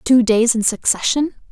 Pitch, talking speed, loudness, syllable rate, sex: 240 Hz, 160 wpm, -16 LUFS, 4.9 syllables/s, female